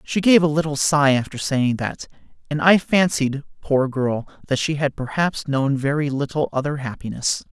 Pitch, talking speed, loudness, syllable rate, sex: 145 Hz, 175 wpm, -20 LUFS, 4.7 syllables/s, male